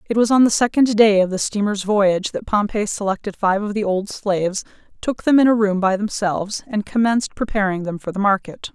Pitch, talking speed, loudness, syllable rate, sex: 205 Hz, 220 wpm, -19 LUFS, 5.6 syllables/s, female